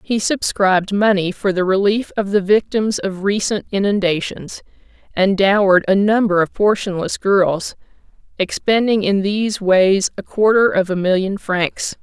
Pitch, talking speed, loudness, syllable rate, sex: 195 Hz, 145 wpm, -17 LUFS, 4.5 syllables/s, female